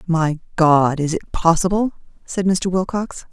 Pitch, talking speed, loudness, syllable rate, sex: 175 Hz, 145 wpm, -19 LUFS, 4.2 syllables/s, female